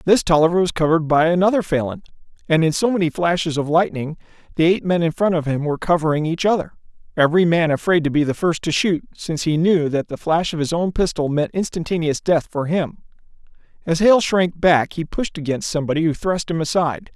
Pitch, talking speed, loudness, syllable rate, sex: 165 Hz, 210 wpm, -19 LUFS, 6.1 syllables/s, male